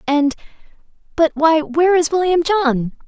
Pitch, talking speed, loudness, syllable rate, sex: 315 Hz, 115 wpm, -16 LUFS, 4.5 syllables/s, female